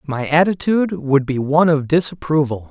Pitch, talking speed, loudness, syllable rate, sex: 150 Hz, 155 wpm, -17 LUFS, 5.4 syllables/s, male